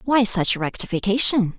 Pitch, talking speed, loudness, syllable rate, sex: 210 Hz, 115 wpm, -18 LUFS, 4.7 syllables/s, female